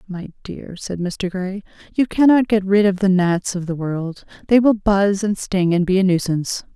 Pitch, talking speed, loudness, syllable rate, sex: 190 Hz, 215 wpm, -18 LUFS, 4.7 syllables/s, female